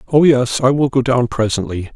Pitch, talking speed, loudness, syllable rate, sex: 125 Hz, 215 wpm, -15 LUFS, 5.4 syllables/s, male